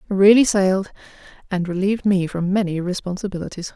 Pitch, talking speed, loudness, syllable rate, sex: 190 Hz, 130 wpm, -19 LUFS, 6.1 syllables/s, female